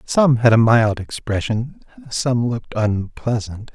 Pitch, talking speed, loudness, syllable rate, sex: 115 Hz, 130 wpm, -18 LUFS, 3.9 syllables/s, male